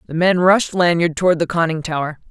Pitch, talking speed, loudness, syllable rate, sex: 170 Hz, 210 wpm, -17 LUFS, 5.9 syllables/s, female